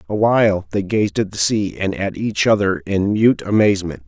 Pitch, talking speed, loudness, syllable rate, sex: 100 Hz, 190 wpm, -18 LUFS, 5.0 syllables/s, male